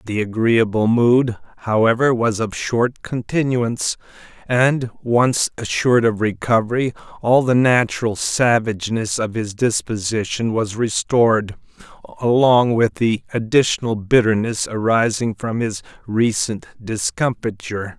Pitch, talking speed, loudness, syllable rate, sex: 115 Hz, 105 wpm, -18 LUFS, 4.4 syllables/s, male